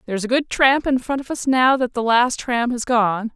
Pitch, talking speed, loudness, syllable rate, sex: 245 Hz, 270 wpm, -19 LUFS, 5.0 syllables/s, female